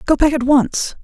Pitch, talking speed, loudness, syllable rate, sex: 275 Hz, 230 wpm, -15 LUFS, 4.7 syllables/s, female